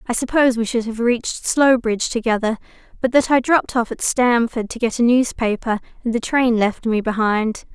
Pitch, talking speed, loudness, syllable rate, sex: 235 Hz, 195 wpm, -19 LUFS, 5.4 syllables/s, female